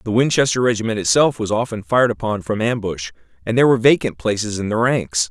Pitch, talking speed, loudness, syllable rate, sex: 110 Hz, 205 wpm, -18 LUFS, 6.4 syllables/s, male